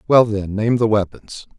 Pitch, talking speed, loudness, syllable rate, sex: 110 Hz, 190 wpm, -18 LUFS, 4.6 syllables/s, male